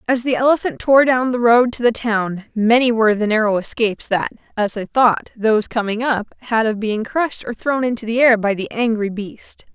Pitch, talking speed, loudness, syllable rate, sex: 230 Hz, 215 wpm, -17 LUFS, 5.2 syllables/s, female